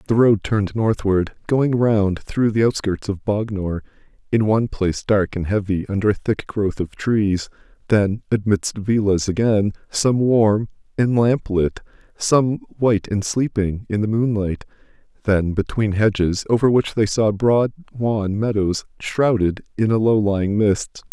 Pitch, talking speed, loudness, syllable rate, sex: 105 Hz, 155 wpm, -20 LUFS, 4.3 syllables/s, male